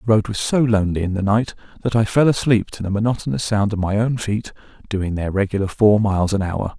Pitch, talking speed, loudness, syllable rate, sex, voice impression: 105 Hz, 240 wpm, -19 LUFS, 6.0 syllables/s, male, masculine, middle-aged, relaxed, powerful, slightly dark, slightly muffled, raspy, sincere, calm, mature, friendly, reassuring, wild, kind, modest